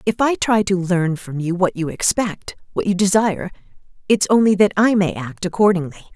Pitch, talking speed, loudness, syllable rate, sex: 190 Hz, 195 wpm, -18 LUFS, 5.4 syllables/s, female